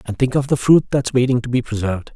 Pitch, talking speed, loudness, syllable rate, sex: 125 Hz, 280 wpm, -18 LUFS, 6.5 syllables/s, male